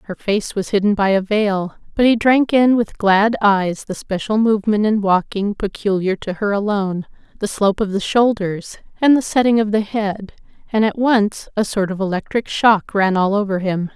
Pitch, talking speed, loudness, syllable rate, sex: 205 Hz, 200 wpm, -17 LUFS, 4.9 syllables/s, female